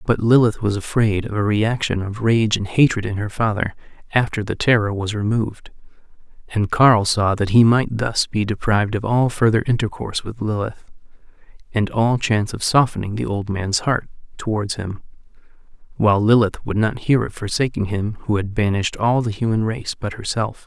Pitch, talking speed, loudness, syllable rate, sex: 110 Hz, 180 wpm, -19 LUFS, 5.3 syllables/s, male